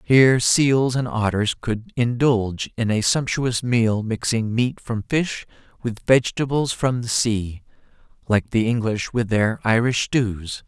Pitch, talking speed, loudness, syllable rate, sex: 115 Hz, 145 wpm, -21 LUFS, 4.0 syllables/s, male